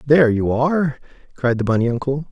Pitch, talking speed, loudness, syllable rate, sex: 135 Hz, 180 wpm, -18 LUFS, 6.0 syllables/s, male